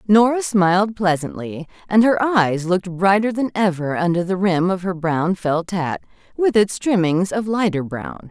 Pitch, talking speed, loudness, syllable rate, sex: 185 Hz, 175 wpm, -19 LUFS, 4.5 syllables/s, female